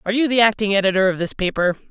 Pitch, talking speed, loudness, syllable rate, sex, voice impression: 205 Hz, 250 wpm, -18 LUFS, 7.7 syllables/s, female, very feminine, adult-like, slightly middle-aged, slightly thin, very tensed, very powerful, very bright, hard, very clear, fluent, cool, very intellectual, refreshing, sincere, calm, slightly reassuring, slightly unique, wild, very lively, strict, intense